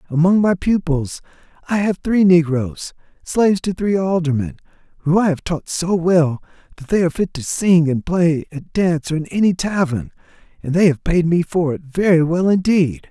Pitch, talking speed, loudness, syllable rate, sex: 170 Hz, 190 wpm, -17 LUFS, 5.0 syllables/s, male